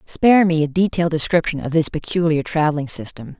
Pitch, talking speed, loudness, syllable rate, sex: 160 Hz, 175 wpm, -18 LUFS, 6.1 syllables/s, female